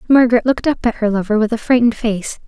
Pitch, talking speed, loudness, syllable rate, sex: 230 Hz, 240 wpm, -16 LUFS, 7.1 syllables/s, female